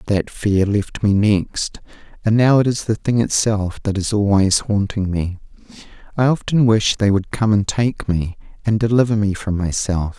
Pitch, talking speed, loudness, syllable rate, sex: 105 Hz, 185 wpm, -18 LUFS, 4.5 syllables/s, male